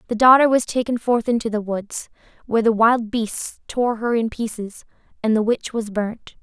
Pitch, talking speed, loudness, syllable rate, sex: 225 Hz, 195 wpm, -20 LUFS, 4.8 syllables/s, female